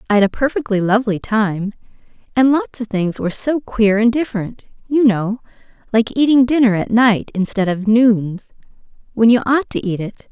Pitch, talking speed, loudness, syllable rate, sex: 225 Hz, 175 wpm, -16 LUFS, 5.1 syllables/s, female